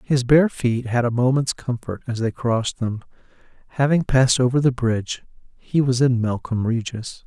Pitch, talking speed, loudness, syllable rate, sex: 125 Hz, 175 wpm, -21 LUFS, 5.1 syllables/s, male